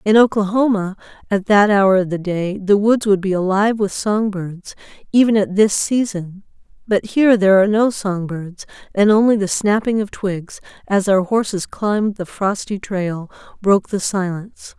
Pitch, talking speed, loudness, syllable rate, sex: 200 Hz, 175 wpm, -17 LUFS, 4.8 syllables/s, female